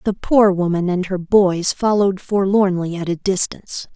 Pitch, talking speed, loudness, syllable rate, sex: 190 Hz, 165 wpm, -17 LUFS, 4.8 syllables/s, female